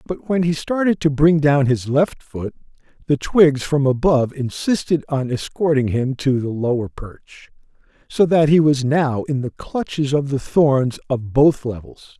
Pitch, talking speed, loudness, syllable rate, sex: 140 Hz, 175 wpm, -18 LUFS, 4.3 syllables/s, male